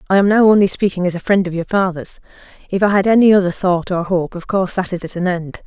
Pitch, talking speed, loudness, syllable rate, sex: 185 Hz, 275 wpm, -16 LUFS, 6.4 syllables/s, female